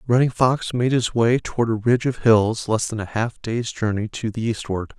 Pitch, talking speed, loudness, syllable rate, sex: 115 Hz, 230 wpm, -21 LUFS, 5.0 syllables/s, male